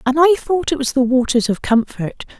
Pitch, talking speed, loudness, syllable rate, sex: 270 Hz, 225 wpm, -17 LUFS, 5.1 syllables/s, female